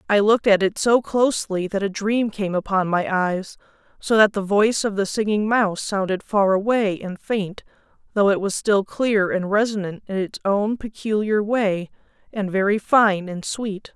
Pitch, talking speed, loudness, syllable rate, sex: 205 Hz, 185 wpm, -21 LUFS, 4.6 syllables/s, female